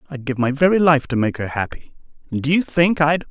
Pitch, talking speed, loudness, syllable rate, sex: 145 Hz, 255 wpm, -19 LUFS, 6.0 syllables/s, male